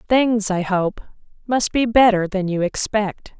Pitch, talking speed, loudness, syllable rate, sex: 210 Hz, 160 wpm, -19 LUFS, 4.0 syllables/s, female